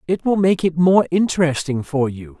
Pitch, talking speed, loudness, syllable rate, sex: 165 Hz, 200 wpm, -18 LUFS, 5.0 syllables/s, male